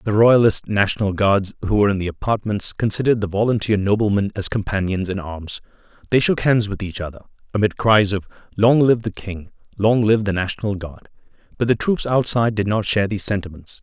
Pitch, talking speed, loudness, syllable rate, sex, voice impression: 105 Hz, 190 wpm, -19 LUFS, 5.9 syllables/s, male, masculine, adult-like, tensed, powerful, clear, fluent, cool, intellectual, mature, wild, lively, kind